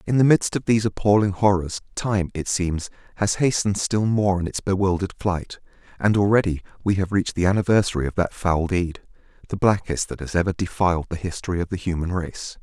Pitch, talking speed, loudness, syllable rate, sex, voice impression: 95 Hz, 195 wpm, -22 LUFS, 5.9 syllables/s, male, masculine, adult-like, cool, slightly intellectual, slightly calm, kind